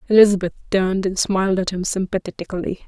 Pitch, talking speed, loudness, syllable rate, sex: 190 Hz, 145 wpm, -20 LUFS, 6.8 syllables/s, female